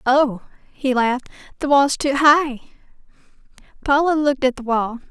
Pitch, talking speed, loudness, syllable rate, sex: 270 Hz, 140 wpm, -18 LUFS, 5.0 syllables/s, female